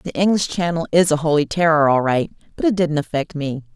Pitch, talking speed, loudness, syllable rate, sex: 160 Hz, 225 wpm, -18 LUFS, 5.7 syllables/s, female